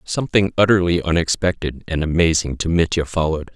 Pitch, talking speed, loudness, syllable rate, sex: 85 Hz, 135 wpm, -19 LUFS, 6.0 syllables/s, male